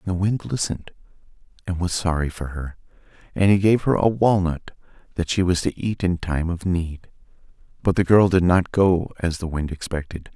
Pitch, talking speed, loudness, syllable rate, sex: 90 Hz, 195 wpm, -22 LUFS, 5.2 syllables/s, male